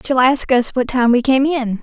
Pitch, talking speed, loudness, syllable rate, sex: 255 Hz, 265 wpm, -15 LUFS, 4.9 syllables/s, female